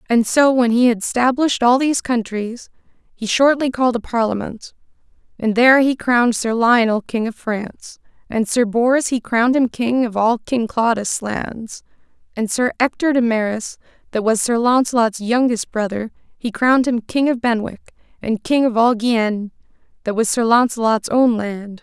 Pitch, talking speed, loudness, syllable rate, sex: 235 Hz, 175 wpm, -17 LUFS, 5.0 syllables/s, female